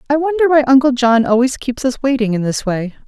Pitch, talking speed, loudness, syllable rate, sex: 255 Hz, 235 wpm, -15 LUFS, 6.0 syllables/s, female